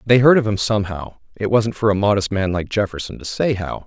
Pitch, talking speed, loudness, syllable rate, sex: 105 Hz, 235 wpm, -19 LUFS, 5.9 syllables/s, male